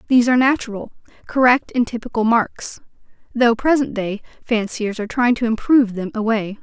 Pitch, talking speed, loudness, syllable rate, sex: 235 Hz, 155 wpm, -18 LUFS, 5.6 syllables/s, female